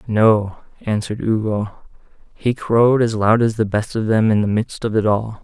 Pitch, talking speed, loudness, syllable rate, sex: 110 Hz, 200 wpm, -18 LUFS, 4.8 syllables/s, male